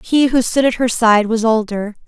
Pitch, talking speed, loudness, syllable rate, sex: 230 Hz, 230 wpm, -15 LUFS, 4.7 syllables/s, female